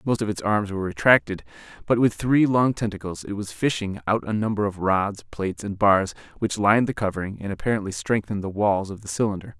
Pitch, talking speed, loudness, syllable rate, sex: 100 Hz, 215 wpm, -23 LUFS, 6.0 syllables/s, male